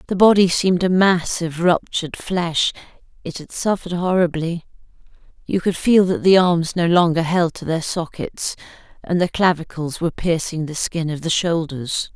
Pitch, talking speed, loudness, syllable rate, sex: 170 Hz, 170 wpm, -19 LUFS, 4.8 syllables/s, female